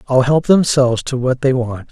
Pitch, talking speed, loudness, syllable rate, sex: 130 Hz, 220 wpm, -15 LUFS, 5.1 syllables/s, male